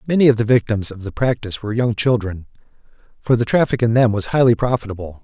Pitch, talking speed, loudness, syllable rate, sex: 115 Hz, 205 wpm, -18 LUFS, 6.7 syllables/s, male